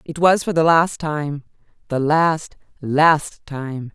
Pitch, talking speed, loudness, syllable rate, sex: 150 Hz, 135 wpm, -18 LUFS, 3.2 syllables/s, female